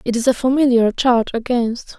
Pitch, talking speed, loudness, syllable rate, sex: 240 Hz, 180 wpm, -17 LUFS, 5.4 syllables/s, female